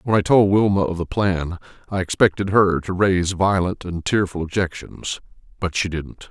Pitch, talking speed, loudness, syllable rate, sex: 95 Hz, 180 wpm, -20 LUFS, 4.9 syllables/s, male